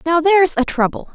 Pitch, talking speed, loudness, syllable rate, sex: 325 Hz, 210 wpm, -16 LUFS, 5.9 syllables/s, female